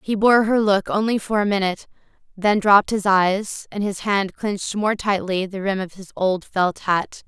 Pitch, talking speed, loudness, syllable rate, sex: 200 Hz, 205 wpm, -20 LUFS, 4.8 syllables/s, female